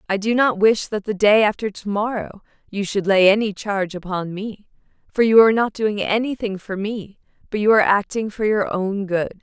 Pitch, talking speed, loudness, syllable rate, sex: 205 Hz, 210 wpm, -19 LUFS, 5.2 syllables/s, female